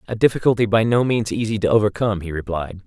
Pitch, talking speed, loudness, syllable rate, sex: 105 Hz, 210 wpm, -19 LUFS, 6.7 syllables/s, male